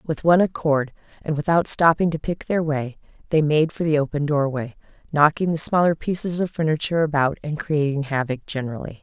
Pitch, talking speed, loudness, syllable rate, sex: 150 Hz, 180 wpm, -21 LUFS, 5.6 syllables/s, female